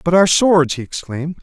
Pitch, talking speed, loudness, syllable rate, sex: 165 Hz, 210 wpm, -15 LUFS, 5.5 syllables/s, male